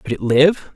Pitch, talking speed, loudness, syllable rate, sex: 135 Hz, 240 wpm, -15 LUFS, 4.8 syllables/s, male